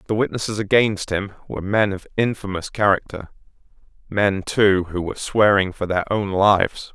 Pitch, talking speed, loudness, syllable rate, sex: 100 Hz, 155 wpm, -20 LUFS, 5.1 syllables/s, male